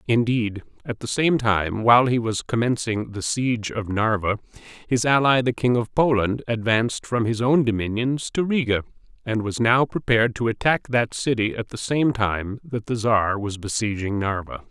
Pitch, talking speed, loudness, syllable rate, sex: 115 Hz, 180 wpm, -22 LUFS, 4.8 syllables/s, male